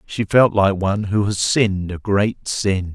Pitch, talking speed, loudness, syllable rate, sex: 100 Hz, 205 wpm, -18 LUFS, 4.2 syllables/s, male